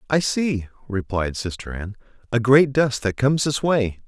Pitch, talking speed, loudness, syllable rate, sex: 120 Hz, 175 wpm, -21 LUFS, 4.9 syllables/s, male